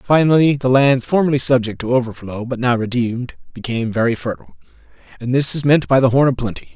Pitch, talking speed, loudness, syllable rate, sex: 125 Hz, 195 wpm, -17 LUFS, 6.3 syllables/s, male